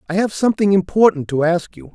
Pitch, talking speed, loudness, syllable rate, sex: 190 Hz, 215 wpm, -17 LUFS, 6.3 syllables/s, male